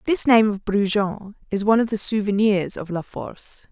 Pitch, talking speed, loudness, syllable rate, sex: 205 Hz, 195 wpm, -21 LUFS, 5.0 syllables/s, female